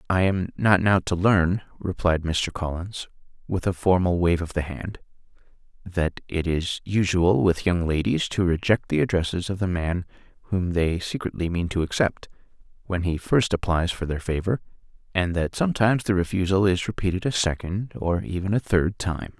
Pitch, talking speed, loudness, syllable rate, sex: 90 Hz, 175 wpm, -24 LUFS, 5.0 syllables/s, male